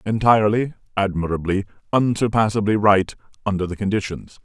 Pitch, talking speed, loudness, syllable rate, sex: 105 Hz, 95 wpm, -20 LUFS, 5.7 syllables/s, male